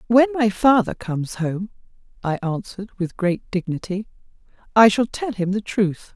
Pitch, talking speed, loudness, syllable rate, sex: 205 Hz, 155 wpm, -21 LUFS, 4.7 syllables/s, female